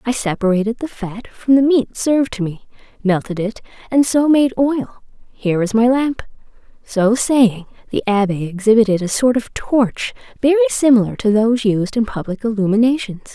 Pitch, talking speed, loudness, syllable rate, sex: 225 Hz, 160 wpm, -17 LUFS, 5.2 syllables/s, female